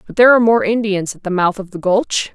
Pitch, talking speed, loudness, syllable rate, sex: 205 Hz, 280 wpm, -15 LUFS, 6.4 syllables/s, female